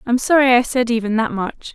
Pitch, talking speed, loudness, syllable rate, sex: 240 Hz, 240 wpm, -17 LUFS, 5.5 syllables/s, female